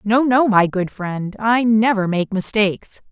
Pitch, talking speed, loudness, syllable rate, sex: 210 Hz, 175 wpm, -17 LUFS, 4.1 syllables/s, female